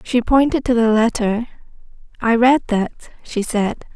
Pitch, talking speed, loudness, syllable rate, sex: 230 Hz, 150 wpm, -17 LUFS, 4.5 syllables/s, female